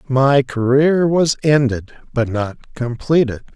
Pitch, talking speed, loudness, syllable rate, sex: 135 Hz, 120 wpm, -17 LUFS, 3.7 syllables/s, male